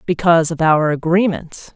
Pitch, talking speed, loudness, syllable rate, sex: 165 Hz, 135 wpm, -15 LUFS, 5.0 syllables/s, female